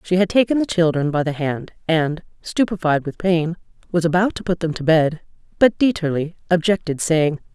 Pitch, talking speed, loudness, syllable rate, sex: 170 Hz, 185 wpm, -19 LUFS, 5.1 syllables/s, female